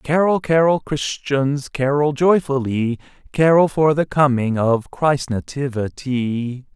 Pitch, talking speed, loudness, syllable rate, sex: 140 Hz, 105 wpm, -18 LUFS, 3.6 syllables/s, male